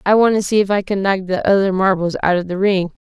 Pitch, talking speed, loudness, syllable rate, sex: 195 Hz, 295 wpm, -16 LUFS, 6.2 syllables/s, female